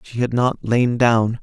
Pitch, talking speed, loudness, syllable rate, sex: 120 Hz, 210 wpm, -18 LUFS, 3.9 syllables/s, male